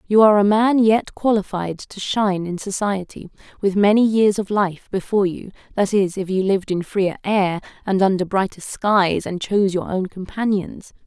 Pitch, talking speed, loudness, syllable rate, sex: 195 Hz, 185 wpm, -19 LUFS, 5.0 syllables/s, female